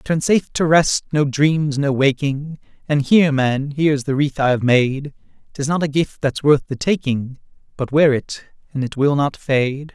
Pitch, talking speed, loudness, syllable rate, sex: 145 Hz, 195 wpm, -18 LUFS, 4.6 syllables/s, male